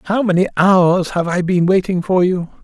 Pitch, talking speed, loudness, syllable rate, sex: 180 Hz, 205 wpm, -15 LUFS, 4.8 syllables/s, male